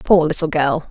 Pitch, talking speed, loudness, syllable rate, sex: 155 Hz, 200 wpm, -16 LUFS, 4.9 syllables/s, female